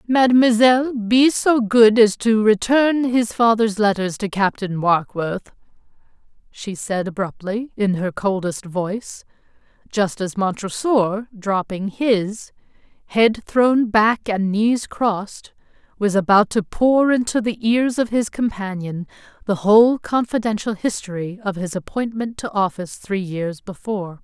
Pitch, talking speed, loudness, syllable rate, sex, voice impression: 210 Hz, 125 wpm, -19 LUFS, 4.1 syllables/s, female, very feminine, slightly middle-aged, slightly thin, very tensed, powerful, very bright, hard, clear, slightly halting, slightly raspy, cool, slightly intellectual, slightly refreshing, sincere, calm, slightly friendly, slightly reassuring, very unique, slightly elegant, very wild, slightly sweet, very lively, very strict, intense, sharp